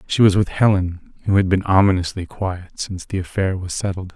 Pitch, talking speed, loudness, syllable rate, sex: 95 Hz, 200 wpm, -20 LUFS, 5.5 syllables/s, male